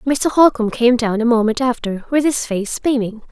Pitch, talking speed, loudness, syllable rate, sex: 240 Hz, 200 wpm, -17 LUFS, 5.1 syllables/s, female